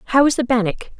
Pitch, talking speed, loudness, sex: 240 Hz, 240 wpm, -18 LUFS, female